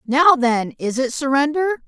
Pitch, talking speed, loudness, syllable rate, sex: 270 Hz, 160 wpm, -18 LUFS, 5.1 syllables/s, female